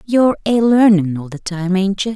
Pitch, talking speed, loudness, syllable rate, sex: 200 Hz, 225 wpm, -15 LUFS, 4.9 syllables/s, female